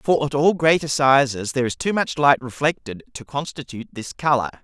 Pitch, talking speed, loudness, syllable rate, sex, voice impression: 140 Hz, 195 wpm, -20 LUFS, 5.5 syllables/s, male, masculine, adult-like, slightly tensed, refreshing, slightly unique, slightly lively